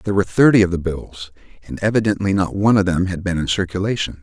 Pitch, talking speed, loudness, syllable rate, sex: 95 Hz, 225 wpm, -18 LUFS, 6.9 syllables/s, male